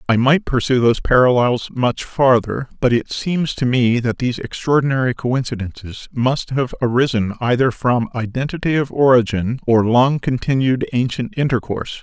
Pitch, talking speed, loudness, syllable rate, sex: 125 Hz, 145 wpm, -17 LUFS, 5.0 syllables/s, male